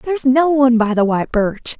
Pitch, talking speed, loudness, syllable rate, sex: 250 Hz, 235 wpm, -15 LUFS, 5.8 syllables/s, female